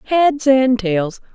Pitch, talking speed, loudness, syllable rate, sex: 245 Hz, 135 wpm, -15 LUFS, 2.9 syllables/s, female